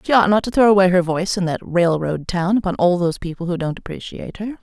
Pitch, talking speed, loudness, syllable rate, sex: 185 Hz, 260 wpm, -18 LUFS, 6.5 syllables/s, female